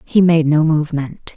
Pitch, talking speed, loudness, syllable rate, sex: 155 Hz, 175 wpm, -15 LUFS, 4.8 syllables/s, female